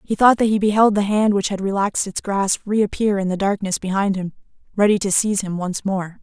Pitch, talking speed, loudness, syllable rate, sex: 200 Hz, 230 wpm, -19 LUFS, 5.6 syllables/s, female